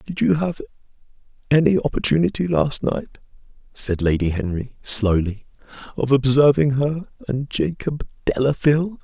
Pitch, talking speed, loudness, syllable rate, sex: 135 Hz, 115 wpm, -20 LUFS, 4.6 syllables/s, male